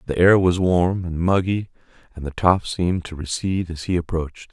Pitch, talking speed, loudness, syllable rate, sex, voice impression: 85 Hz, 200 wpm, -21 LUFS, 5.4 syllables/s, male, masculine, adult-like, slightly thick, tensed, slightly powerful, hard, cool, calm, slightly mature, wild, lively, slightly strict